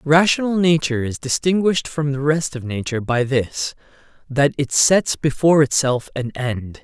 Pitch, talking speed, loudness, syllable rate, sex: 145 Hz, 160 wpm, -19 LUFS, 4.9 syllables/s, male